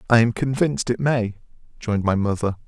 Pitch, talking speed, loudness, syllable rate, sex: 115 Hz, 180 wpm, -22 LUFS, 6.0 syllables/s, male